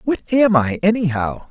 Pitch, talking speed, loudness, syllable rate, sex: 180 Hz, 160 wpm, -17 LUFS, 4.7 syllables/s, male